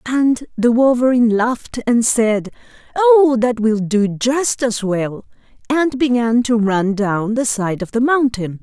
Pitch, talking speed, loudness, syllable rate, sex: 235 Hz, 160 wpm, -16 LUFS, 3.9 syllables/s, female